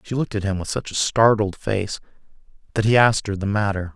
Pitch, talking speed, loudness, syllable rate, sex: 105 Hz, 225 wpm, -21 LUFS, 6.2 syllables/s, male